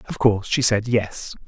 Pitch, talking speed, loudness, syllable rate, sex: 110 Hz, 205 wpm, -20 LUFS, 4.8 syllables/s, male